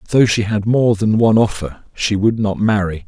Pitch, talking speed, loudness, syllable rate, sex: 105 Hz, 215 wpm, -16 LUFS, 5.2 syllables/s, male